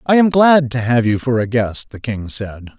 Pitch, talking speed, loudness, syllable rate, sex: 125 Hz, 260 wpm, -16 LUFS, 4.7 syllables/s, male